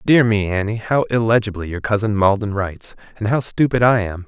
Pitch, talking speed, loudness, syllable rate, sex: 105 Hz, 195 wpm, -18 LUFS, 5.7 syllables/s, male